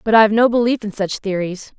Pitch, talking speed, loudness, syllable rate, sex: 210 Hz, 235 wpm, -17 LUFS, 6.1 syllables/s, female